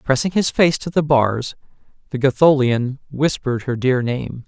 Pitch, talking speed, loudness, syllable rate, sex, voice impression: 135 Hz, 160 wpm, -18 LUFS, 4.6 syllables/s, male, masculine, slightly adult-like, clear, intellectual, calm